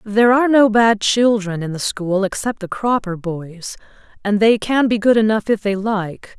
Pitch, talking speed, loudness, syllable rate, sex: 210 Hz, 190 wpm, -17 LUFS, 4.7 syllables/s, female